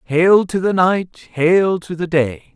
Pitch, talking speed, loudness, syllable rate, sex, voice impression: 170 Hz, 190 wpm, -16 LUFS, 3.5 syllables/s, male, masculine, adult-like, refreshing, slightly sincere, slightly friendly